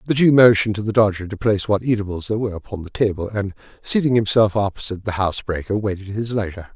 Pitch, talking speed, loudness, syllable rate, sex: 105 Hz, 215 wpm, -20 LUFS, 7.2 syllables/s, male